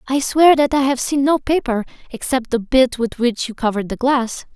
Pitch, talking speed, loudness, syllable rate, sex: 255 Hz, 225 wpm, -17 LUFS, 5.2 syllables/s, female